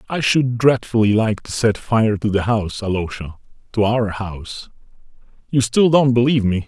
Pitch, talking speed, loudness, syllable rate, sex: 110 Hz, 170 wpm, -18 LUFS, 5.0 syllables/s, male